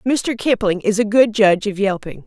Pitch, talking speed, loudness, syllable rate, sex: 210 Hz, 210 wpm, -17 LUFS, 5.1 syllables/s, female